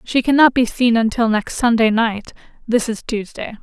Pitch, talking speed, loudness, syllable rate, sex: 230 Hz, 180 wpm, -17 LUFS, 4.7 syllables/s, female